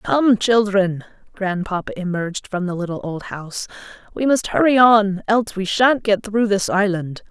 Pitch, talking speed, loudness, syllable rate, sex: 205 Hz, 150 wpm, -19 LUFS, 4.7 syllables/s, female